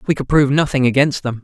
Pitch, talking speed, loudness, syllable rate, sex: 135 Hz, 250 wpm, -15 LUFS, 7.1 syllables/s, male